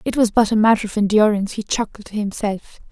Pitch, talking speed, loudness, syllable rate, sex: 210 Hz, 225 wpm, -18 LUFS, 6.3 syllables/s, female